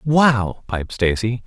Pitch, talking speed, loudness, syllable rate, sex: 115 Hz, 125 wpm, -19 LUFS, 2.9 syllables/s, male